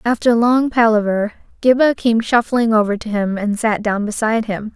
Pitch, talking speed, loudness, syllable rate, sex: 225 Hz, 175 wpm, -16 LUFS, 5.0 syllables/s, female